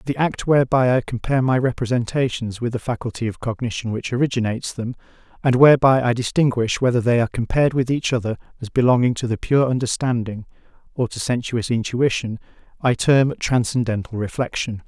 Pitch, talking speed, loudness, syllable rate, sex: 120 Hz, 160 wpm, -20 LUFS, 6.0 syllables/s, male